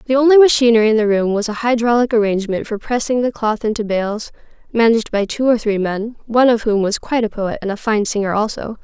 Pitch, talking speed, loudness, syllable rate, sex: 225 Hz, 230 wpm, -16 LUFS, 6.3 syllables/s, female